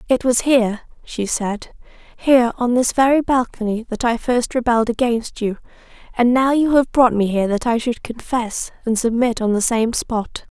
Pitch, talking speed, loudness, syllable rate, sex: 235 Hz, 180 wpm, -18 LUFS, 5.0 syllables/s, female